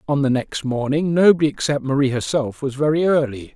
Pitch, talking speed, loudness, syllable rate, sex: 140 Hz, 185 wpm, -19 LUFS, 5.6 syllables/s, male